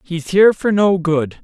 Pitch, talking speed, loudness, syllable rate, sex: 180 Hz, 210 wpm, -15 LUFS, 4.7 syllables/s, male